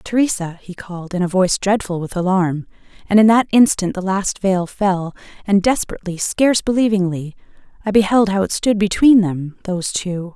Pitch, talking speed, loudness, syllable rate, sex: 195 Hz, 170 wpm, -17 LUFS, 5.4 syllables/s, female